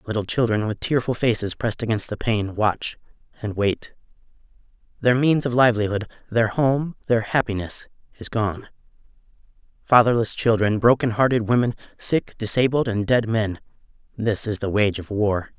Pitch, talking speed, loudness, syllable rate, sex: 110 Hz, 140 wpm, -21 LUFS, 5.0 syllables/s, male